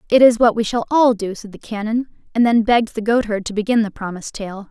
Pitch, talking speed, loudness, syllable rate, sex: 220 Hz, 255 wpm, -18 LUFS, 6.2 syllables/s, female